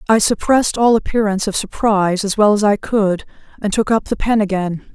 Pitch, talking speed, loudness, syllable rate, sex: 210 Hz, 205 wpm, -16 LUFS, 5.8 syllables/s, female